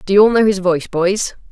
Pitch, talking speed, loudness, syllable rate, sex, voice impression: 195 Hz, 280 wpm, -15 LUFS, 6.4 syllables/s, female, feminine, adult-like, slightly relaxed, powerful, slightly muffled, raspy, intellectual, slightly friendly, slightly unique, lively, slightly strict, slightly sharp